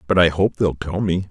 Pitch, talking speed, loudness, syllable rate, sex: 90 Hz, 275 wpm, -19 LUFS, 5.4 syllables/s, male